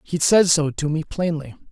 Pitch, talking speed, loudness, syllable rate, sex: 160 Hz, 210 wpm, -20 LUFS, 4.8 syllables/s, male